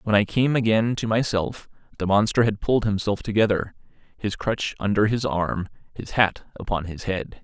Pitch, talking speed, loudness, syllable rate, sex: 105 Hz, 175 wpm, -23 LUFS, 5.0 syllables/s, male